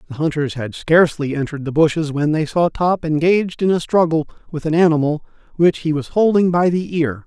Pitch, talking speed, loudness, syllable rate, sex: 160 Hz, 205 wpm, -17 LUFS, 5.7 syllables/s, male